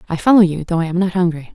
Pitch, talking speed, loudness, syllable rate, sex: 175 Hz, 310 wpm, -16 LUFS, 7.3 syllables/s, female